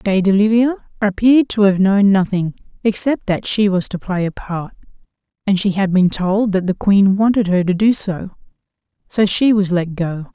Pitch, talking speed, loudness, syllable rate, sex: 195 Hz, 190 wpm, -16 LUFS, 4.7 syllables/s, female